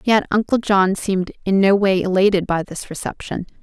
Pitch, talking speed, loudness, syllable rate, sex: 195 Hz, 180 wpm, -18 LUFS, 5.3 syllables/s, female